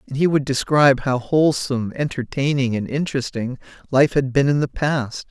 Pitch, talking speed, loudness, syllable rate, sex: 135 Hz, 170 wpm, -20 LUFS, 5.5 syllables/s, male